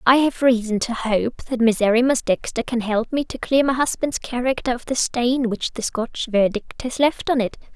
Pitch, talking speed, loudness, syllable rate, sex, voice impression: 240 Hz, 210 wpm, -21 LUFS, 4.8 syllables/s, female, feminine, slightly adult-like, fluent, slightly sincere, slightly unique, slightly kind